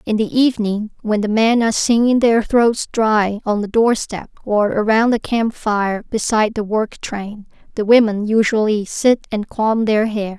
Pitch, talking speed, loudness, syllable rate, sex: 220 Hz, 180 wpm, -17 LUFS, 4.4 syllables/s, female